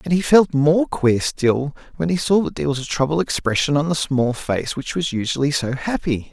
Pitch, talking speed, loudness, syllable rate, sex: 145 Hz, 230 wpm, -19 LUFS, 5.2 syllables/s, male